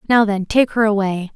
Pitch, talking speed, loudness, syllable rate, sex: 210 Hz, 220 wpm, -17 LUFS, 5.3 syllables/s, female